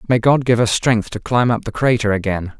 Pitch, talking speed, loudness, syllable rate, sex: 115 Hz, 255 wpm, -17 LUFS, 5.4 syllables/s, male